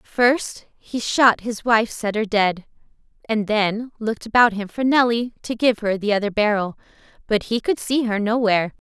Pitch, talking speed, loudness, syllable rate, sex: 220 Hz, 175 wpm, -20 LUFS, 4.8 syllables/s, female